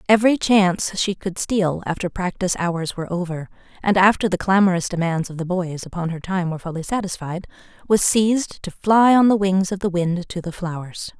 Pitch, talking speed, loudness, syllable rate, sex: 185 Hz, 200 wpm, -20 LUFS, 5.5 syllables/s, female